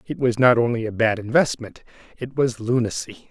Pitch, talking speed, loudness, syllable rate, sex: 120 Hz, 180 wpm, -21 LUFS, 5.2 syllables/s, male